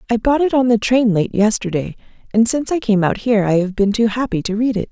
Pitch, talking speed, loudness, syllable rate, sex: 220 Hz, 270 wpm, -17 LUFS, 6.3 syllables/s, female